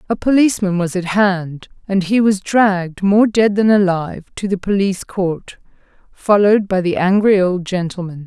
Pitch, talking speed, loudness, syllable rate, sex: 190 Hz, 165 wpm, -16 LUFS, 4.9 syllables/s, female